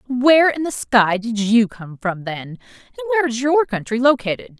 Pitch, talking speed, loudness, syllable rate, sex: 240 Hz, 195 wpm, -18 LUFS, 5.0 syllables/s, female